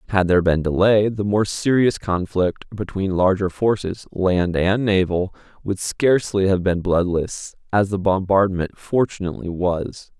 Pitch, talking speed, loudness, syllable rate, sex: 95 Hz, 140 wpm, -20 LUFS, 4.4 syllables/s, male